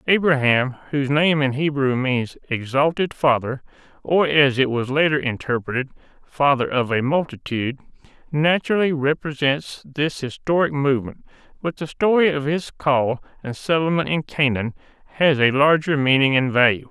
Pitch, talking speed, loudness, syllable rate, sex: 140 Hz, 140 wpm, -20 LUFS, 4.9 syllables/s, male